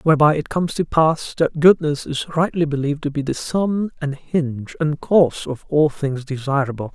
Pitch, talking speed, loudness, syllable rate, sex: 150 Hz, 190 wpm, -19 LUFS, 5.2 syllables/s, male